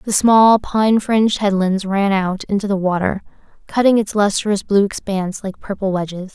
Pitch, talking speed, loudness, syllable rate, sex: 200 Hz, 170 wpm, -17 LUFS, 4.8 syllables/s, female